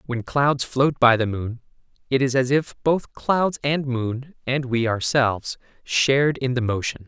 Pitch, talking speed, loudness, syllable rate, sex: 130 Hz, 180 wpm, -22 LUFS, 4.1 syllables/s, male